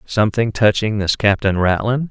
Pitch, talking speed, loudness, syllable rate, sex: 110 Hz, 140 wpm, -17 LUFS, 5.0 syllables/s, male